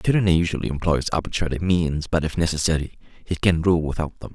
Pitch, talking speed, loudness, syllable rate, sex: 80 Hz, 180 wpm, -22 LUFS, 6.2 syllables/s, male